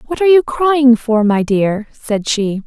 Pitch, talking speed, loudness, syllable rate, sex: 245 Hz, 205 wpm, -14 LUFS, 4.1 syllables/s, female